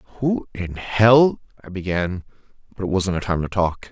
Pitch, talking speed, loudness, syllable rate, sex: 100 Hz, 185 wpm, -20 LUFS, 4.9 syllables/s, male